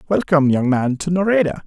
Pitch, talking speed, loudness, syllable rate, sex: 160 Hz, 180 wpm, -17 LUFS, 6.0 syllables/s, male